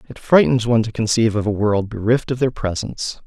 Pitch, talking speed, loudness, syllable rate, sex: 110 Hz, 220 wpm, -18 LUFS, 6.3 syllables/s, male